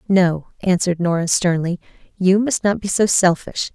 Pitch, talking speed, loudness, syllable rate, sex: 185 Hz, 160 wpm, -18 LUFS, 4.8 syllables/s, female